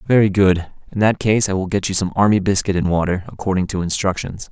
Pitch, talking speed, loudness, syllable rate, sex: 95 Hz, 225 wpm, -18 LUFS, 6.1 syllables/s, male